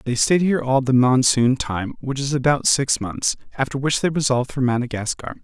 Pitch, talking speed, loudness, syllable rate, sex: 130 Hz, 200 wpm, -20 LUFS, 5.5 syllables/s, male